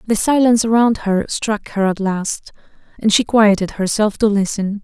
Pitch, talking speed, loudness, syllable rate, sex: 210 Hz, 175 wpm, -16 LUFS, 4.8 syllables/s, female